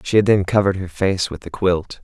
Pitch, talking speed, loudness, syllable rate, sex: 90 Hz, 265 wpm, -19 LUFS, 5.7 syllables/s, male